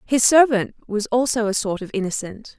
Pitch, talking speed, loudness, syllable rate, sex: 225 Hz, 185 wpm, -20 LUFS, 4.9 syllables/s, female